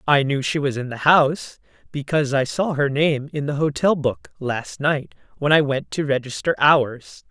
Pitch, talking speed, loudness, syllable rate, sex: 145 Hz, 195 wpm, -20 LUFS, 4.7 syllables/s, female